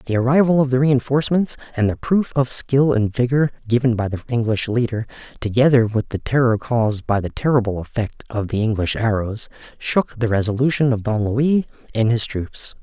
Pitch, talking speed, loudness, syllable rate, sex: 120 Hz, 180 wpm, -19 LUFS, 5.3 syllables/s, male